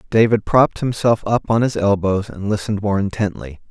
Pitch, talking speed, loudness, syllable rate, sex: 105 Hz, 180 wpm, -18 LUFS, 5.7 syllables/s, male